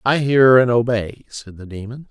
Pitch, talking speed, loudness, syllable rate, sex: 120 Hz, 200 wpm, -15 LUFS, 4.6 syllables/s, male